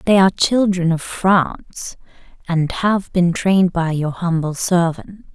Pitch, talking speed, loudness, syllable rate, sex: 175 Hz, 145 wpm, -17 LUFS, 4.1 syllables/s, female